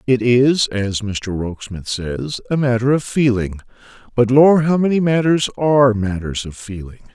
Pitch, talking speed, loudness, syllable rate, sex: 120 Hz, 160 wpm, -17 LUFS, 4.6 syllables/s, male